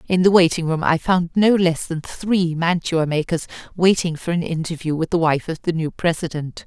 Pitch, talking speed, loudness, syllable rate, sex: 170 Hz, 205 wpm, -20 LUFS, 5.0 syllables/s, female